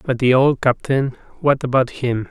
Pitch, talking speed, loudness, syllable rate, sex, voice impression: 130 Hz, 180 wpm, -18 LUFS, 4.5 syllables/s, male, masculine, adult-like, slightly muffled, slightly halting, refreshing, slightly sincere, calm, slightly kind